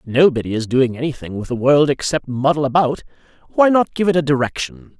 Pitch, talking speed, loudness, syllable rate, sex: 140 Hz, 190 wpm, -17 LUFS, 5.8 syllables/s, male